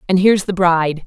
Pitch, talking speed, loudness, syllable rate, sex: 180 Hz, 225 wpm, -15 LUFS, 6.7 syllables/s, female